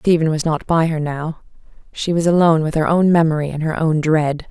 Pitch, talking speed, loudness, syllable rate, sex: 160 Hz, 225 wpm, -17 LUFS, 5.5 syllables/s, female